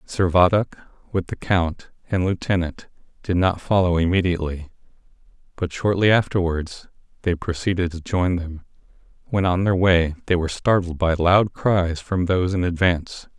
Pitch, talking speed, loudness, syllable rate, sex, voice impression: 90 Hz, 145 wpm, -21 LUFS, 4.9 syllables/s, male, very masculine, very adult-like, slightly old, very thick, relaxed, slightly weak, slightly dark, soft, clear, fluent, very cool, very intellectual, sincere, very calm, very mature, friendly, very reassuring, very unique, elegant, wild, very sweet, slightly lively, very kind, slightly modest